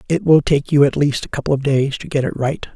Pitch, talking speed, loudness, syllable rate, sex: 140 Hz, 305 wpm, -17 LUFS, 6.0 syllables/s, male